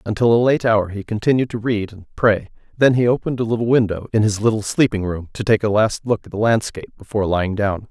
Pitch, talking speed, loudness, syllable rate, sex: 110 Hz, 245 wpm, -18 LUFS, 6.4 syllables/s, male